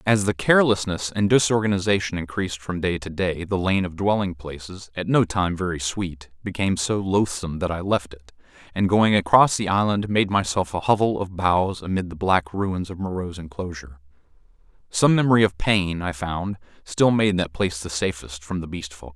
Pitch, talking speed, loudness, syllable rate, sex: 95 Hz, 190 wpm, -22 LUFS, 5.3 syllables/s, male